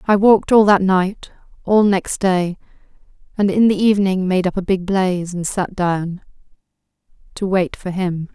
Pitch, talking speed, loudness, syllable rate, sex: 190 Hz, 165 wpm, -17 LUFS, 4.7 syllables/s, female